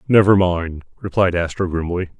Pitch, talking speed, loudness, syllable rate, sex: 90 Hz, 135 wpm, -18 LUFS, 5.1 syllables/s, male